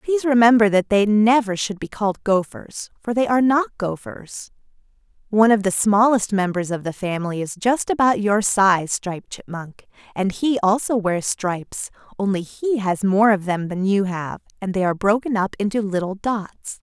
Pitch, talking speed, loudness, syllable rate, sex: 205 Hz, 180 wpm, -20 LUFS, 5.0 syllables/s, female